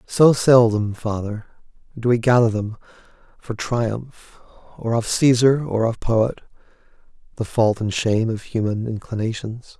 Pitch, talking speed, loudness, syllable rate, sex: 115 Hz, 135 wpm, -20 LUFS, 3.0 syllables/s, male